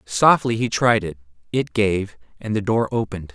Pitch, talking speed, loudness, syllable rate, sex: 105 Hz, 180 wpm, -20 LUFS, 4.9 syllables/s, male